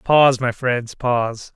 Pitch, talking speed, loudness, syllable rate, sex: 125 Hz, 115 wpm, -19 LUFS, 4.0 syllables/s, male